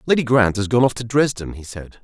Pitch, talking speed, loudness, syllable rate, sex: 115 Hz, 265 wpm, -18 LUFS, 5.8 syllables/s, male